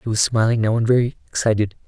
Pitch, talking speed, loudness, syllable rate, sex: 115 Hz, 225 wpm, -19 LUFS, 6.8 syllables/s, male